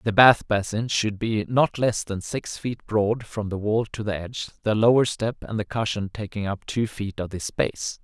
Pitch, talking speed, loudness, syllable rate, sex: 110 Hz, 225 wpm, -24 LUFS, 4.7 syllables/s, male